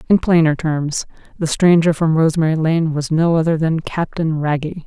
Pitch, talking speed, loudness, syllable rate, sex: 160 Hz, 160 wpm, -17 LUFS, 5.0 syllables/s, female